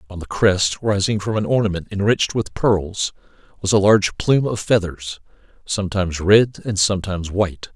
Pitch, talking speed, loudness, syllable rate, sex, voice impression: 100 Hz, 160 wpm, -19 LUFS, 5.5 syllables/s, male, very masculine, very adult-like, middle-aged, very thick, tensed, very powerful, slightly bright, slightly hard, slightly muffled, fluent, very cool, very intellectual, sincere, very calm, very mature, very friendly, very reassuring, slightly unique, very elegant, slightly wild, very sweet, slightly lively, very kind, slightly modest